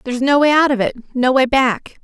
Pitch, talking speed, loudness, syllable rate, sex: 260 Hz, 265 wpm, -15 LUFS, 5.4 syllables/s, female